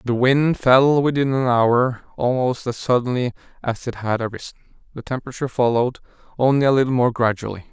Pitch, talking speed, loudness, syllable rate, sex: 125 Hz, 165 wpm, -19 LUFS, 5.7 syllables/s, male